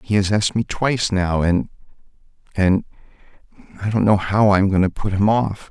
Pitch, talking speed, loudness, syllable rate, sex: 100 Hz, 180 wpm, -19 LUFS, 5.6 syllables/s, male